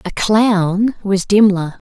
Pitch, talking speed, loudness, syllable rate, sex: 200 Hz, 130 wpm, -14 LUFS, 3.1 syllables/s, female